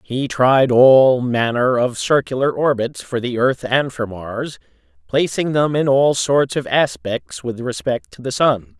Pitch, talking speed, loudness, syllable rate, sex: 125 Hz, 170 wpm, -17 LUFS, 3.9 syllables/s, male